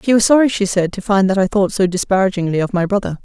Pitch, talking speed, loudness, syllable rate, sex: 195 Hz, 280 wpm, -16 LUFS, 6.7 syllables/s, female